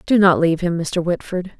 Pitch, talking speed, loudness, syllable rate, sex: 175 Hz, 225 wpm, -18 LUFS, 5.4 syllables/s, female